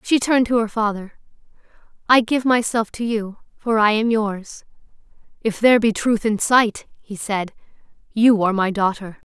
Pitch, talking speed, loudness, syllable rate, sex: 220 Hz, 160 wpm, -19 LUFS, 4.9 syllables/s, female